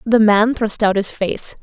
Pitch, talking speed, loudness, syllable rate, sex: 215 Hz, 220 wpm, -16 LUFS, 4.1 syllables/s, female